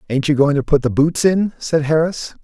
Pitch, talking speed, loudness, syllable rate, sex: 150 Hz, 245 wpm, -16 LUFS, 5.1 syllables/s, male